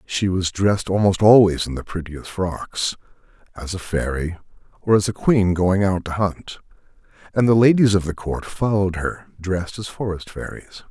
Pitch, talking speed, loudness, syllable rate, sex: 95 Hz, 175 wpm, -20 LUFS, 4.9 syllables/s, male